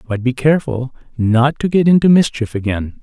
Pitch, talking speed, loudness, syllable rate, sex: 130 Hz, 180 wpm, -15 LUFS, 5.4 syllables/s, male